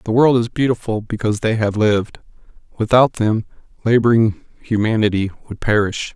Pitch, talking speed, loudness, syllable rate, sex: 110 Hz, 135 wpm, -17 LUFS, 5.5 syllables/s, male